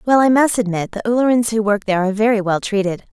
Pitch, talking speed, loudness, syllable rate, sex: 215 Hz, 245 wpm, -17 LUFS, 6.9 syllables/s, female